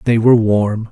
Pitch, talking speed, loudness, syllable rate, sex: 110 Hz, 195 wpm, -13 LUFS, 5.2 syllables/s, male